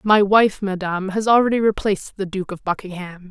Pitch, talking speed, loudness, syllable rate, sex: 195 Hz, 180 wpm, -19 LUFS, 5.6 syllables/s, female